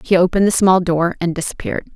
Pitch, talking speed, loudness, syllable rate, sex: 180 Hz, 215 wpm, -16 LUFS, 6.6 syllables/s, female